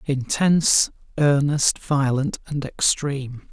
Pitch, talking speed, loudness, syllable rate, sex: 140 Hz, 85 wpm, -21 LUFS, 3.6 syllables/s, male